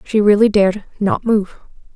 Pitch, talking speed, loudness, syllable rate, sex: 205 Hz, 155 wpm, -15 LUFS, 4.9 syllables/s, female